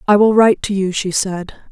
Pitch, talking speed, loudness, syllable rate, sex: 200 Hz, 245 wpm, -15 LUFS, 5.6 syllables/s, female